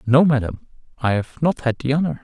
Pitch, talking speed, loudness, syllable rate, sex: 135 Hz, 215 wpm, -20 LUFS, 5.7 syllables/s, male